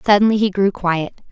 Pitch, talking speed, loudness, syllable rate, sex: 195 Hz, 185 wpm, -17 LUFS, 5.7 syllables/s, female